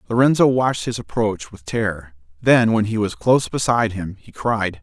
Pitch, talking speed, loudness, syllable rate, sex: 110 Hz, 185 wpm, -19 LUFS, 5.3 syllables/s, male